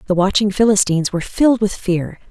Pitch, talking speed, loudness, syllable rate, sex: 195 Hz, 180 wpm, -16 LUFS, 6.4 syllables/s, female